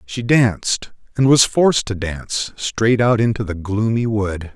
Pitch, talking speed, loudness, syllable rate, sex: 110 Hz, 170 wpm, -18 LUFS, 4.3 syllables/s, male